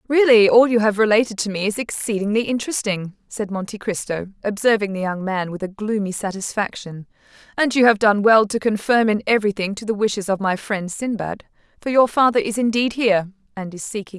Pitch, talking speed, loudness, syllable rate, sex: 210 Hz, 200 wpm, -19 LUFS, 5.8 syllables/s, female